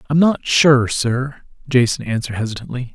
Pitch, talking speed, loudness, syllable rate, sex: 125 Hz, 145 wpm, -17 LUFS, 5.2 syllables/s, male